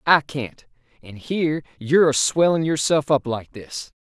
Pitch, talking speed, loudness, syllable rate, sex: 135 Hz, 165 wpm, -21 LUFS, 4.5 syllables/s, male